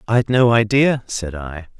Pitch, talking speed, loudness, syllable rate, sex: 110 Hz, 165 wpm, -17 LUFS, 4.0 syllables/s, male